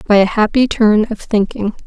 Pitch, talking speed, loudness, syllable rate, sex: 215 Hz, 195 wpm, -14 LUFS, 5.1 syllables/s, female